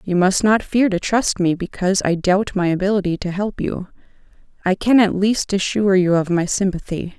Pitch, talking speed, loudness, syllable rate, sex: 190 Hz, 200 wpm, -18 LUFS, 5.2 syllables/s, female